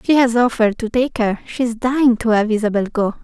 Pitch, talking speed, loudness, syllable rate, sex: 230 Hz, 205 wpm, -17 LUFS, 5.6 syllables/s, female